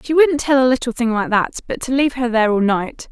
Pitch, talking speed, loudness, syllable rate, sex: 250 Hz, 290 wpm, -17 LUFS, 6.1 syllables/s, female